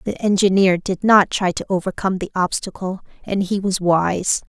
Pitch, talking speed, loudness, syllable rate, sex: 190 Hz, 170 wpm, -19 LUFS, 5.0 syllables/s, female